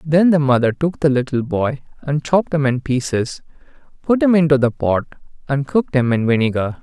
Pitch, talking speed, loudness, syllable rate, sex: 140 Hz, 195 wpm, -17 LUFS, 5.5 syllables/s, male